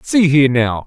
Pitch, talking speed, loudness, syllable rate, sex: 140 Hz, 210 wpm, -13 LUFS, 5.2 syllables/s, male